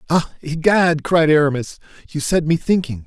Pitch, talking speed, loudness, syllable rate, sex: 160 Hz, 155 wpm, -17 LUFS, 4.8 syllables/s, male